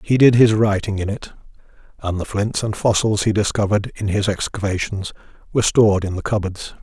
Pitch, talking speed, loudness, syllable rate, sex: 105 Hz, 185 wpm, -19 LUFS, 5.8 syllables/s, male